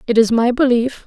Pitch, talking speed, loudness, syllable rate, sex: 240 Hz, 225 wpm, -15 LUFS, 5.5 syllables/s, female